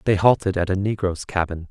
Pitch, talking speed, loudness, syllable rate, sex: 95 Hz, 210 wpm, -21 LUFS, 5.7 syllables/s, male